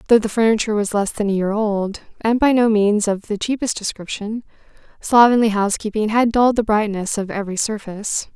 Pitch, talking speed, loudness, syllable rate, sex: 215 Hz, 185 wpm, -18 LUFS, 5.8 syllables/s, female